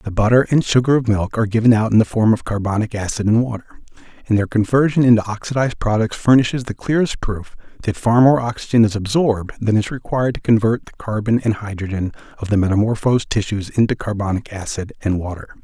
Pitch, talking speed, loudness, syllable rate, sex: 110 Hz, 195 wpm, -18 LUFS, 6.2 syllables/s, male